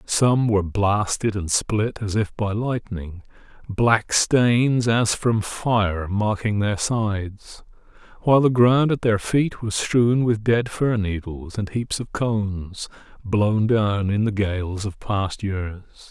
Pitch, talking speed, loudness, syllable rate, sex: 105 Hz, 155 wpm, -21 LUFS, 3.4 syllables/s, male